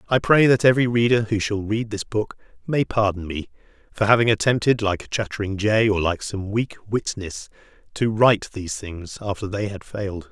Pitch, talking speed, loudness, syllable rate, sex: 105 Hz, 190 wpm, -21 LUFS, 5.4 syllables/s, male